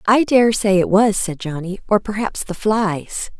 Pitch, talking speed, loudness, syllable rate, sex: 205 Hz, 160 wpm, -18 LUFS, 4.4 syllables/s, female